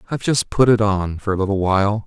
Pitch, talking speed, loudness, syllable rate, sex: 100 Hz, 260 wpm, -18 LUFS, 6.5 syllables/s, male